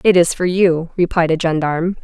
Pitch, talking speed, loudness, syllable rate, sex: 170 Hz, 205 wpm, -16 LUFS, 5.4 syllables/s, female